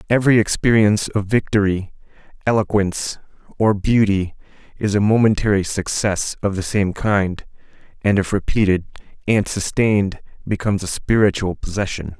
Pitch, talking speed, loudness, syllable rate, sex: 100 Hz, 120 wpm, -19 LUFS, 5.2 syllables/s, male